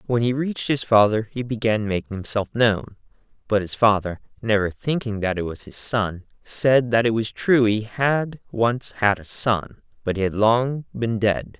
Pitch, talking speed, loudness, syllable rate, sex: 110 Hz, 190 wpm, -22 LUFS, 4.5 syllables/s, male